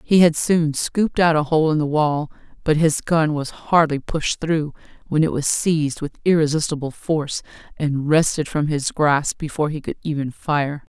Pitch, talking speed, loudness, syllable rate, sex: 155 Hz, 185 wpm, -20 LUFS, 4.8 syllables/s, female